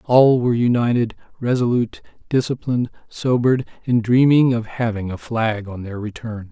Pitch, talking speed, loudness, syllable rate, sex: 120 Hz, 140 wpm, -19 LUFS, 5.2 syllables/s, male